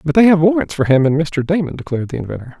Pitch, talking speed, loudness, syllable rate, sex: 155 Hz, 275 wpm, -15 LUFS, 7.2 syllables/s, male